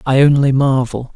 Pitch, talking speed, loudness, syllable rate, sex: 135 Hz, 155 wpm, -14 LUFS, 4.9 syllables/s, male